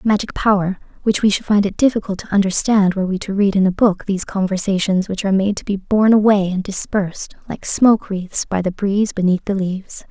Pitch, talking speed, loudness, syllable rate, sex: 195 Hz, 220 wpm, -17 LUFS, 6.0 syllables/s, female